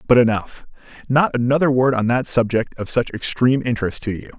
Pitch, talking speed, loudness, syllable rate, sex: 120 Hz, 190 wpm, -19 LUFS, 5.8 syllables/s, male